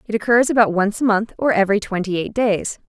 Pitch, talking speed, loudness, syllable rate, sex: 210 Hz, 225 wpm, -18 LUFS, 6.0 syllables/s, female